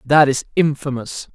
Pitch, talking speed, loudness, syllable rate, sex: 140 Hz, 135 wpm, -18 LUFS, 4.5 syllables/s, male